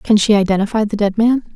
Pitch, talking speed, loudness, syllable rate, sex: 210 Hz, 230 wpm, -15 LUFS, 6.2 syllables/s, female